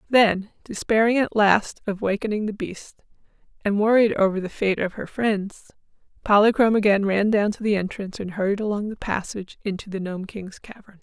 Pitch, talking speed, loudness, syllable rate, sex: 205 Hz, 180 wpm, -22 LUFS, 5.4 syllables/s, female